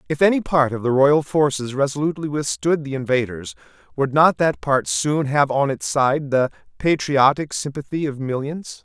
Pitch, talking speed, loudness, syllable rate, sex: 140 Hz, 170 wpm, -20 LUFS, 4.9 syllables/s, male